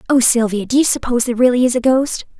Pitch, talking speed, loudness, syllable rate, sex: 245 Hz, 250 wpm, -15 LUFS, 7.1 syllables/s, female